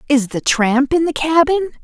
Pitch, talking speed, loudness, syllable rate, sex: 285 Hz, 195 wpm, -15 LUFS, 5.0 syllables/s, female